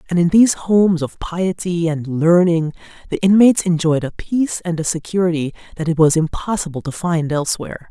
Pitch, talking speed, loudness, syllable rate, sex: 170 Hz, 175 wpm, -17 LUFS, 5.6 syllables/s, female